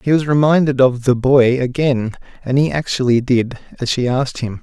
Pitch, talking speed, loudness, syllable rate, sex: 130 Hz, 195 wpm, -16 LUFS, 5.2 syllables/s, male